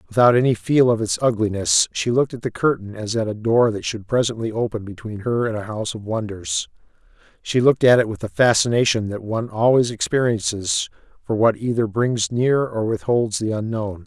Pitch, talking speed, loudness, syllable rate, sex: 115 Hz, 195 wpm, -20 LUFS, 5.6 syllables/s, male